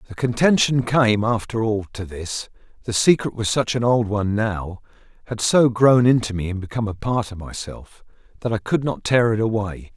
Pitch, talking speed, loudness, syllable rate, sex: 110 Hz, 195 wpm, -20 LUFS, 5.1 syllables/s, male